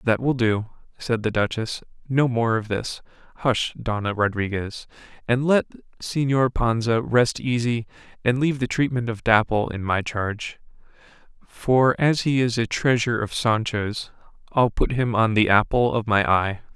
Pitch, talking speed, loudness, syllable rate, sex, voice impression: 115 Hz, 160 wpm, -22 LUFS, 4.5 syllables/s, male, very masculine, very adult-like, middle-aged, thick, slightly tensed, powerful, slightly bright, slightly hard, slightly clear, slightly halting, cool, intellectual, slightly refreshing, sincere, calm, mature, friendly, reassuring, slightly unique, slightly elegant, wild, slightly sweet, slightly lively, kind, slightly modest